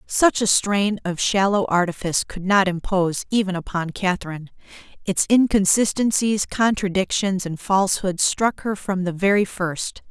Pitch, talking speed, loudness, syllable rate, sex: 190 Hz, 135 wpm, -20 LUFS, 4.8 syllables/s, female